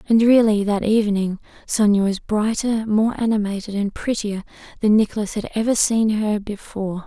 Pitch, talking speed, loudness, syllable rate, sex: 210 Hz, 155 wpm, -20 LUFS, 5.1 syllables/s, female